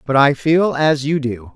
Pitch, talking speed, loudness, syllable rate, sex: 145 Hz, 230 wpm, -16 LUFS, 4.3 syllables/s, male